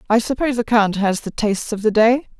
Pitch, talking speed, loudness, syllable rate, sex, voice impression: 225 Hz, 250 wpm, -18 LUFS, 6.1 syllables/s, female, very feminine, middle-aged, slightly thin, slightly relaxed, very powerful, slightly dark, slightly hard, very clear, very fluent, cool, very intellectual, refreshing, sincere, slightly calm, slightly friendly, slightly reassuring, unique, elegant, slightly wild, sweet, lively, slightly kind, intense, sharp, light